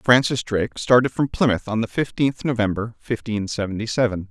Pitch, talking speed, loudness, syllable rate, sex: 115 Hz, 180 wpm, -21 LUFS, 5.7 syllables/s, male